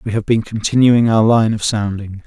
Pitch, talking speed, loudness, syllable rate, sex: 110 Hz, 210 wpm, -15 LUFS, 5.1 syllables/s, male